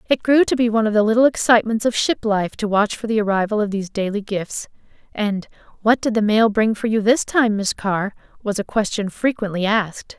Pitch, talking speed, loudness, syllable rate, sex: 215 Hz, 225 wpm, -19 LUFS, 5.7 syllables/s, female